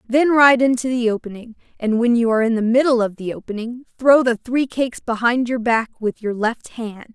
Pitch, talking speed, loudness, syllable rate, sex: 235 Hz, 220 wpm, -18 LUFS, 5.3 syllables/s, female